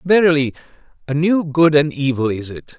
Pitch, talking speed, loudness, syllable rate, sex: 150 Hz, 170 wpm, -17 LUFS, 5.1 syllables/s, male